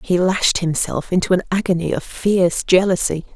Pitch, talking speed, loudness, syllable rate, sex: 180 Hz, 160 wpm, -18 LUFS, 5.1 syllables/s, female